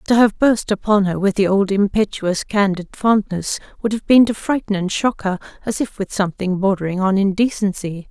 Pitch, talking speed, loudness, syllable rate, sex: 200 Hz, 190 wpm, -18 LUFS, 5.2 syllables/s, female